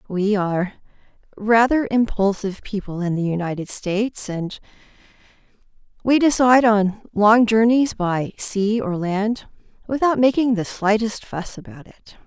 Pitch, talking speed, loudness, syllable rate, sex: 210 Hz, 125 wpm, -20 LUFS, 4.5 syllables/s, female